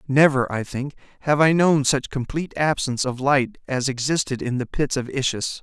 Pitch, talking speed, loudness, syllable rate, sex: 135 Hz, 190 wpm, -22 LUFS, 5.2 syllables/s, male